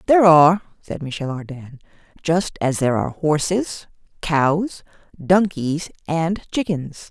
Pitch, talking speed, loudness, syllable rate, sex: 160 Hz, 120 wpm, -20 LUFS, 4.3 syllables/s, female